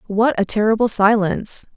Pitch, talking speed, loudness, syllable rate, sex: 215 Hz, 135 wpm, -17 LUFS, 5.3 syllables/s, female